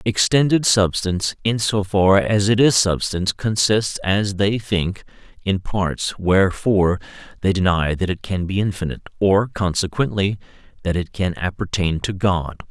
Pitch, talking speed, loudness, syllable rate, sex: 95 Hz, 145 wpm, -19 LUFS, 4.6 syllables/s, male